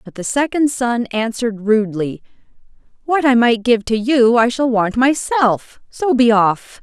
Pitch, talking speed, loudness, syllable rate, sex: 235 Hz, 165 wpm, -16 LUFS, 4.3 syllables/s, female